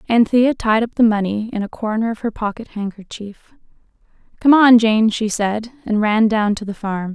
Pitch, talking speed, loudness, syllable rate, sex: 220 Hz, 195 wpm, -17 LUFS, 4.9 syllables/s, female